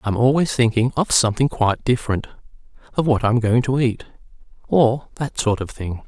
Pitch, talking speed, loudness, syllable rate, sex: 120 Hz, 170 wpm, -19 LUFS, 5.5 syllables/s, male